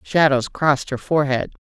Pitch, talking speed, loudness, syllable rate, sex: 140 Hz, 150 wpm, -19 LUFS, 5.4 syllables/s, female